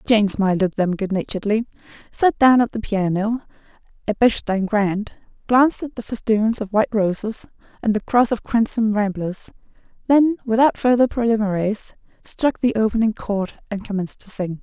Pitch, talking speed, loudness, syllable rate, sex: 215 Hz, 160 wpm, -20 LUFS, 5.1 syllables/s, female